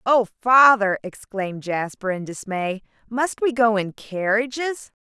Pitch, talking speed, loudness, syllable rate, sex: 220 Hz, 130 wpm, -21 LUFS, 4.2 syllables/s, female